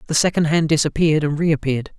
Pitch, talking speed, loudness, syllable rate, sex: 155 Hz, 150 wpm, -18 LUFS, 6.7 syllables/s, male